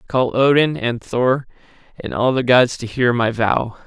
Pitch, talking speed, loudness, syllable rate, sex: 125 Hz, 200 wpm, -17 LUFS, 4.4 syllables/s, male